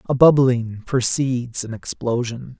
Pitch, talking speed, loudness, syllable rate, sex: 125 Hz, 115 wpm, -20 LUFS, 4.3 syllables/s, male